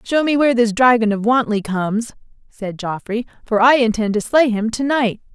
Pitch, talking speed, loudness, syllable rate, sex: 230 Hz, 200 wpm, -17 LUFS, 5.2 syllables/s, female